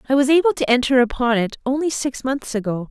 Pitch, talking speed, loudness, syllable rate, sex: 255 Hz, 225 wpm, -19 LUFS, 6.0 syllables/s, female